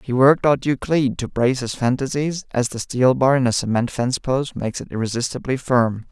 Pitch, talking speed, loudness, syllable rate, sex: 130 Hz, 205 wpm, -20 LUFS, 5.5 syllables/s, male